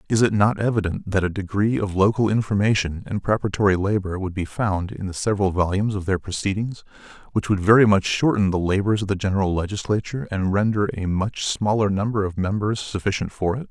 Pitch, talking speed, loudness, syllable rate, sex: 100 Hz, 195 wpm, -22 LUFS, 6.1 syllables/s, male